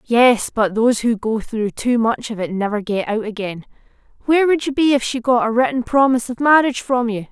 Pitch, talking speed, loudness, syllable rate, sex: 235 Hz, 230 wpm, -18 LUFS, 5.6 syllables/s, female